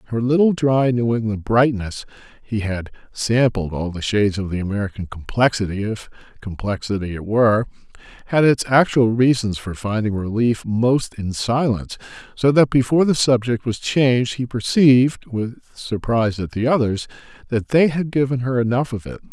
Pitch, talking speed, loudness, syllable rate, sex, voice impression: 115 Hz, 155 wpm, -19 LUFS, 4.8 syllables/s, male, masculine, slightly middle-aged, thick, cool, sincere, calm, slightly mature, slightly elegant